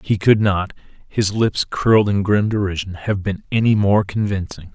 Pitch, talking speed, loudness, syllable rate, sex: 100 Hz, 150 wpm, -18 LUFS, 4.7 syllables/s, male